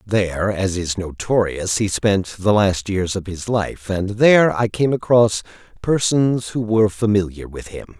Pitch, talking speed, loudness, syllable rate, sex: 100 Hz, 175 wpm, -18 LUFS, 4.3 syllables/s, male